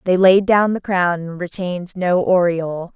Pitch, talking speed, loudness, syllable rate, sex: 180 Hz, 185 wpm, -17 LUFS, 4.6 syllables/s, female